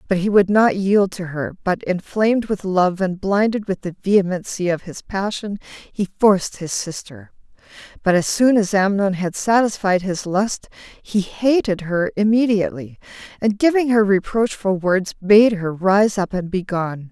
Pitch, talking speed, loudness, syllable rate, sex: 195 Hz, 170 wpm, -19 LUFS, 4.5 syllables/s, female